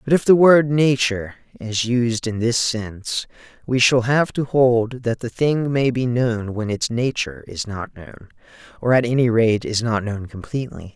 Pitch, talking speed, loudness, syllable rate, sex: 120 Hz, 190 wpm, -19 LUFS, 4.6 syllables/s, male